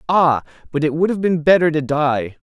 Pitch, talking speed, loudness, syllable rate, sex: 155 Hz, 220 wpm, -17 LUFS, 5.2 syllables/s, male